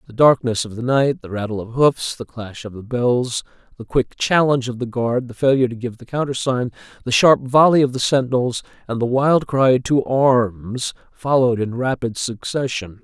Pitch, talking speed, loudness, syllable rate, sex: 125 Hz, 195 wpm, -19 LUFS, 4.9 syllables/s, male